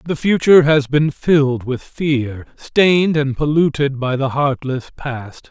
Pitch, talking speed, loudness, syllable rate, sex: 140 Hz, 155 wpm, -16 LUFS, 4.0 syllables/s, male